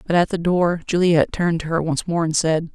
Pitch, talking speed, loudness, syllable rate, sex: 170 Hz, 260 wpm, -20 LUFS, 5.9 syllables/s, female